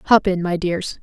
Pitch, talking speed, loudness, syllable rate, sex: 180 Hz, 235 wpm, -19 LUFS, 4.1 syllables/s, female